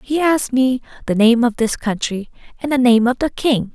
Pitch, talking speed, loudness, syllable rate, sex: 245 Hz, 225 wpm, -17 LUFS, 5.2 syllables/s, female